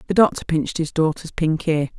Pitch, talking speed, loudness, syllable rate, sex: 160 Hz, 210 wpm, -21 LUFS, 5.8 syllables/s, female